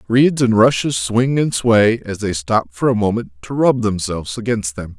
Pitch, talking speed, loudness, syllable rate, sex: 110 Hz, 205 wpm, -17 LUFS, 4.7 syllables/s, male